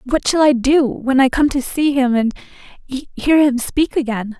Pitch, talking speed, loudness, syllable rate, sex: 270 Hz, 205 wpm, -16 LUFS, 4.6 syllables/s, female